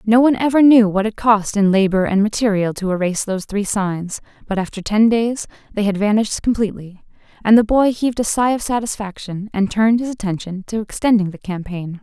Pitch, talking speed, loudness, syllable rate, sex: 210 Hz, 200 wpm, -17 LUFS, 5.8 syllables/s, female